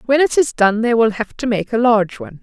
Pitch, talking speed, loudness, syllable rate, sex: 225 Hz, 295 wpm, -16 LUFS, 6.1 syllables/s, female